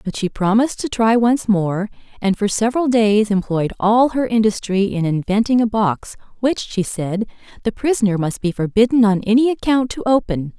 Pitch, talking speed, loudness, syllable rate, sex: 215 Hz, 180 wpm, -18 LUFS, 5.1 syllables/s, female